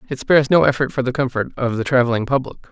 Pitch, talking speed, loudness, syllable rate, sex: 130 Hz, 245 wpm, -18 LUFS, 7.2 syllables/s, male